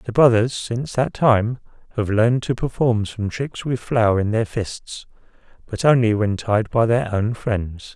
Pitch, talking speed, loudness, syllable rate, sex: 115 Hz, 180 wpm, -20 LUFS, 4.3 syllables/s, male